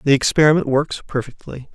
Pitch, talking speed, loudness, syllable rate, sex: 140 Hz, 140 wpm, -17 LUFS, 5.9 syllables/s, male